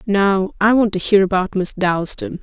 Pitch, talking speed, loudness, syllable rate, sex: 195 Hz, 200 wpm, -17 LUFS, 4.4 syllables/s, female